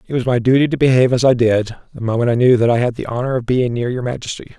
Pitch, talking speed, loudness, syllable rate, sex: 125 Hz, 300 wpm, -16 LUFS, 7.1 syllables/s, male